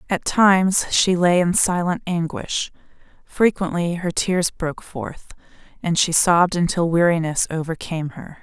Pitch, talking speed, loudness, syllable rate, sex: 175 Hz, 135 wpm, -20 LUFS, 4.6 syllables/s, female